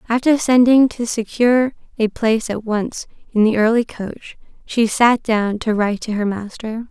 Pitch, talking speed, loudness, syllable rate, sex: 225 Hz, 175 wpm, -17 LUFS, 4.9 syllables/s, female